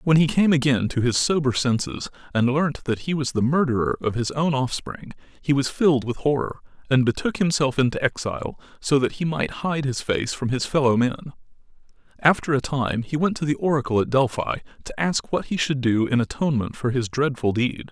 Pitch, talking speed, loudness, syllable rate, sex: 135 Hz, 210 wpm, -22 LUFS, 5.5 syllables/s, male